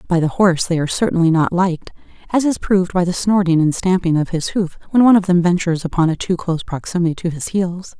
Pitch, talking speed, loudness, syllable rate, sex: 175 Hz, 240 wpm, -17 LUFS, 6.5 syllables/s, female